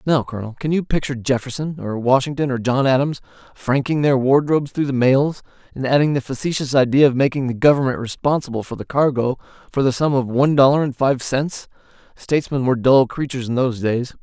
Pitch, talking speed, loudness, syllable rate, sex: 135 Hz, 195 wpm, -19 LUFS, 6.2 syllables/s, male